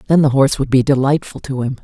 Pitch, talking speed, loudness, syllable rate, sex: 135 Hz, 260 wpm, -15 LUFS, 6.7 syllables/s, female